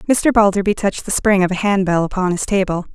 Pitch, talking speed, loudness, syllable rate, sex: 195 Hz, 225 wpm, -16 LUFS, 6.3 syllables/s, female